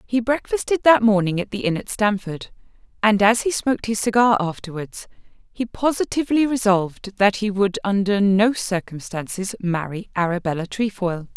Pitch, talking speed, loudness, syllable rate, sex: 205 Hz, 150 wpm, -20 LUFS, 5.0 syllables/s, female